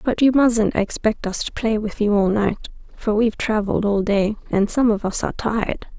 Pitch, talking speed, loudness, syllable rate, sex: 215 Hz, 220 wpm, -20 LUFS, 5.2 syllables/s, female